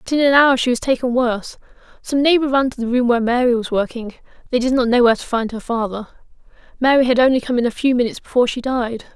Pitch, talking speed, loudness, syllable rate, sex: 245 Hz, 250 wpm, -17 LUFS, 6.8 syllables/s, female